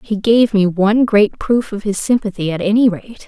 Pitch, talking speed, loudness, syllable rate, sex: 210 Hz, 220 wpm, -15 LUFS, 5.1 syllables/s, female